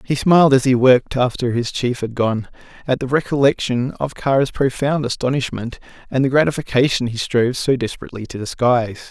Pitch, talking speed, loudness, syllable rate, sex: 130 Hz, 170 wpm, -18 LUFS, 5.9 syllables/s, male